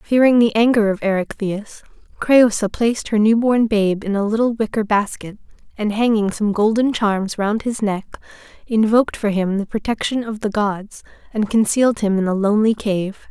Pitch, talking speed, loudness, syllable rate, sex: 215 Hz, 175 wpm, -18 LUFS, 5.0 syllables/s, female